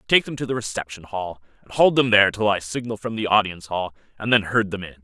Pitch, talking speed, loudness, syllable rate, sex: 105 Hz, 260 wpm, -21 LUFS, 6.4 syllables/s, male